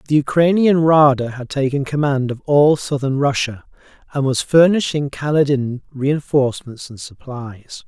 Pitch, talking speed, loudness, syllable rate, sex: 140 Hz, 130 wpm, -17 LUFS, 4.5 syllables/s, male